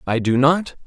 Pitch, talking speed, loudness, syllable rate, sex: 140 Hz, 210 wpm, -18 LUFS, 4.5 syllables/s, male